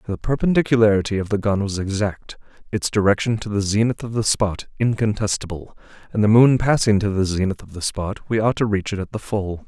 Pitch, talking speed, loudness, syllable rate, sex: 105 Hz, 210 wpm, -20 LUFS, 5.7 syllables/s, male